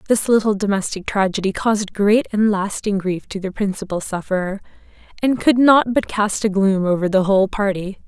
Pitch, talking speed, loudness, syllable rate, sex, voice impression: 200 Hz, 180 wpm, -18 LUFS, 5.3 syllables/s, female, very feminine, slightly young, thin, tensed, slightly weak, very bright, hard, very clear, fluent, slightly raspy, very cute, slightly cool, intellectual, refreshing, very sincere, calm, very mature, very friendly, very reassuring, very unique, elegant, slightly wild, very sweet, very lively, kind, slightly sharp